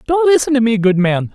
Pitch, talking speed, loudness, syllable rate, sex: 225 Hz, 270 wpm, -14 LUFS, 5.8 syllables/s, male